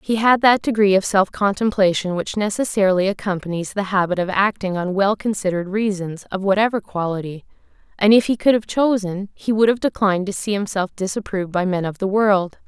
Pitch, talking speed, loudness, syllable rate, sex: 200 Hz, 190 wpm, -19 LUFS, 5.7 syllables/s, female